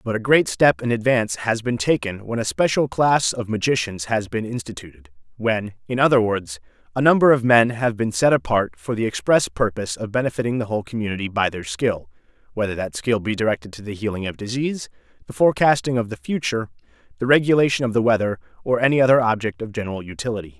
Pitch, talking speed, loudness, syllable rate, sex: 110 Hz, 200 wpm, -20 LUFS, 6.3 syllables/s, male